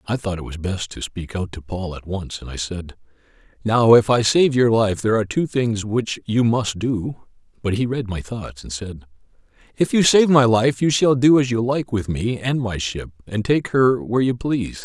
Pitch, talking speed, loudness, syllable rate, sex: 110 Hz, 235 wpm, -20 LUFS, 4.9 syllables/s, male